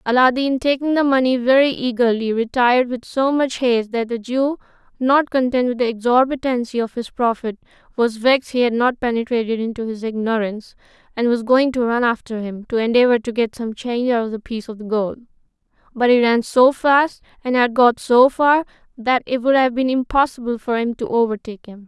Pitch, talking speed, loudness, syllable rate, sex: 245 Hz, 195 wpm, -18 LUFS, 5.5 syllables/s, female